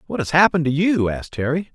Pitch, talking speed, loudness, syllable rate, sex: 150 Hz, 240 wpm, -19 LUFS, 6.9 syllables/s, male